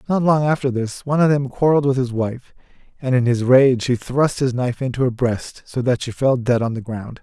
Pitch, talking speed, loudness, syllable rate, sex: 130 Hz, 250 wpm, -19 LUFS, 5.5 syllables/s, male